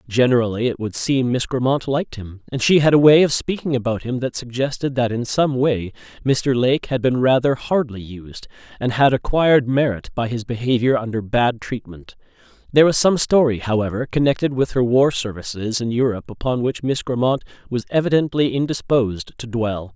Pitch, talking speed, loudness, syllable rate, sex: 125 Hz, 185 wpm, -19 LUFS, 5.4 syllables/s, male